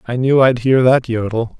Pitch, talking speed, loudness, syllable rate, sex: 125 Hz, 225 wpm, -14 LUFS, 4.9 syllables/s, male